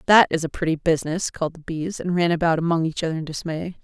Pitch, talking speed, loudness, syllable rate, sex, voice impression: 165 Hz, 250 wpm, -22 LUFS, 6.7 syllables/s, female, feminine, middle-aged, tensed, hard, slightly fluent, intellectual, calm, reassuring, elegant, slightly strict, slightly sharp